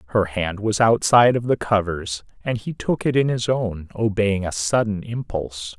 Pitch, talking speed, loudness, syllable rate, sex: 105 Hz, 185 wpm, -21 LUFS, 4.8 syllables/s, male